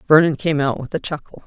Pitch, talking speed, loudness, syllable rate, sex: 150 Hz, 245 wpm, -19 LUFS, 6.0 syllables/s, female